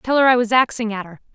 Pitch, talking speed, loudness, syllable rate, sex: 230 Hz, 315 wpm, -17 LUFS, 6.7 syllables/s, female